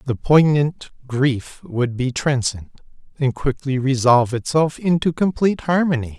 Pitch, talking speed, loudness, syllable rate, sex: 140 Hz, 125 wpm, -19 LUFS, 4.5 syllables/s, male